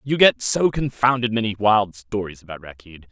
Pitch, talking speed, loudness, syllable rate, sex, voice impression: 110 Hz, 175 wpm, -20 LUFS, 5.0 syllables/s, male, masculine, adult-like, tensed, bright, clear, fluent, refreshing, friendly, lively, kind, light